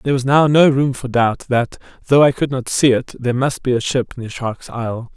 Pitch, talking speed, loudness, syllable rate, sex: 130 Hz, 255 wpm, -17 LUFS, 5.3 syllables/s, male